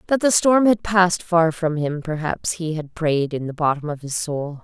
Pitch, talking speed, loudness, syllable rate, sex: 165 Hz, 235 wpm, -20 LUFS, 4.8 syllables/s, female